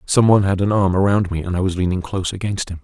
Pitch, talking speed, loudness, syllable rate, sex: 95 Hz, 295 wpm, -18 LUFS, 7.0 syllables/s, male